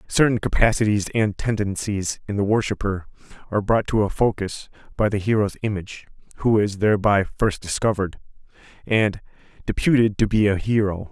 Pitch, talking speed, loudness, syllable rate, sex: 105 Hz, 145 wpm, -22 LUFS, 5.5 syllables/s, male